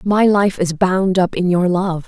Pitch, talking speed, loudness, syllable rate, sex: 185 Hz, 230 wpm, -16 LUFS, 4.1 syllables/s, female